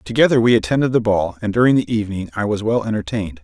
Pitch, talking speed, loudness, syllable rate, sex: 110 Hz, 225 wpm, -18 LUFS, 7.1 syllables/s, male